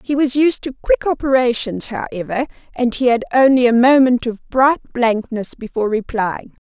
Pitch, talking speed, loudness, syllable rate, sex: 245 Hz, 160 wpm, -17 LUFS, 4.9 syllables/s, female